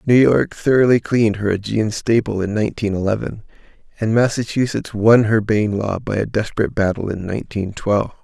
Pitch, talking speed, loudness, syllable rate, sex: 110 Hz, 170 wpm, -18 LUFS, 5.7 syllables/s, male